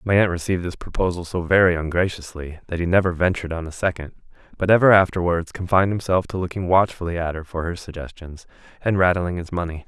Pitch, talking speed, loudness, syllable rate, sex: 90 Hz, 195 wpm, -21 LUFS, 6.4 syllables/s, male